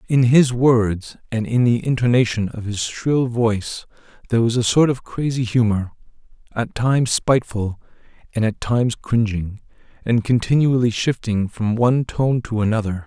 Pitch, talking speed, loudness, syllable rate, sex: 115 Hz, 150 wpm, -19 LUFS, 4.8 syllables/s, male